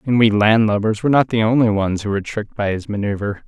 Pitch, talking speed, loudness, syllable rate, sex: 105 Hz, 240 wpm, -17 LUFS, 6.2 syllables/s, male